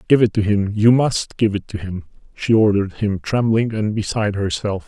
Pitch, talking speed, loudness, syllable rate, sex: 105 Hz, 210 wpm, -19 LUFS, 5.3 syllables/s, male